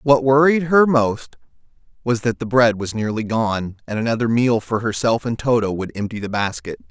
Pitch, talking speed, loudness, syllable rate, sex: 115 Hz, 190 wpm, -19 LUFS, 5.0 syllables/s, male